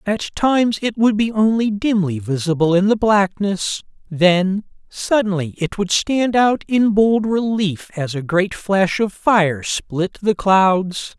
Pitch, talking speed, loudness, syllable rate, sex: 195 Hz, 155 wpm, -17 LUFS, 3.7 syllables/s, male